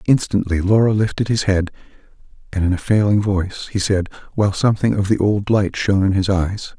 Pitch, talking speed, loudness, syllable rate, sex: 100 Hz, 195 wpm, -18 LUFS, 5.7 syllables/s, male